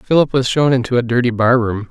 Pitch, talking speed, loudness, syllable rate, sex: 125 Hz, 250 wpm, -15 LUFS, 5.9 syllables/s, male